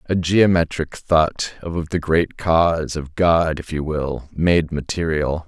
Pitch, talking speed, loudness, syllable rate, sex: 80 Hz, 155 wpm, -20 LUFS, 3.6 syllables/s, male